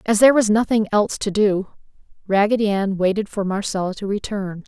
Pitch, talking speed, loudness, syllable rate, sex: 205 Hz, 180 wpm, -19 LUFS, 5.9 syllables/s, female